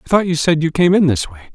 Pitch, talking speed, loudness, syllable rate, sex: 160 Hz, 350 wpm, -15 LUFS, 6.8 syllables/s, male